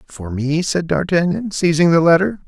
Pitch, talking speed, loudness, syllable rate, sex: 155 Hz, 170 wpm, -16 LUFS, 4.9 syllables/s, male